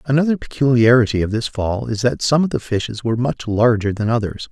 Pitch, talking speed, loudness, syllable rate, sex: 120 Hz, 215 wpm, -18 LUFS, 5.9 syllables/s, male